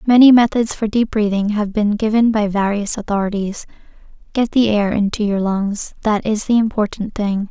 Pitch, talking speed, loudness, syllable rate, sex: 210 Hz, 170 wpm, -17 LUFS, 5.0 syllables/s, female